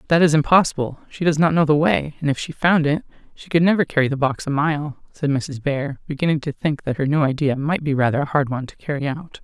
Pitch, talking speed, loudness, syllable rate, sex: 150 Hz, 260 wpm, -20 LUFS, 6.0 syllables/s, female